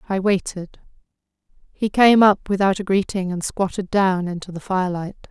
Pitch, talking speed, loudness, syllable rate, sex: 190 Hz, 160 wpm, -20 LUFS, 5.0 syllables/s, female